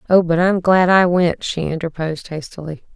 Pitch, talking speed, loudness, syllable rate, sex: 170 Hz, 185 wpm, -17 LUFS, 5.2 syllables/s, female